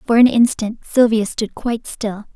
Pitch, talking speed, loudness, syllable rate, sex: 225 Hz, 180 wpm, -17 LUFS, 5.1 syllables/s, female